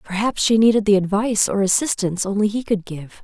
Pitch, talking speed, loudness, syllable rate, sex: 205 Hz, 205 wpm, -19 LUFS, 6.0 syllables/s, female